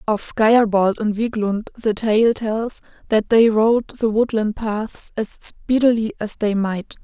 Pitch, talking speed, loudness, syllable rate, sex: 220 Hz, 155 wpm, -19 LUFS, 3.7 syllables/s, female